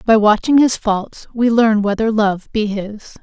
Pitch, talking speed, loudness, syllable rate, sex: 220 Hz, 185 wpm, -15 LUFS, 4.0 syllables/s, female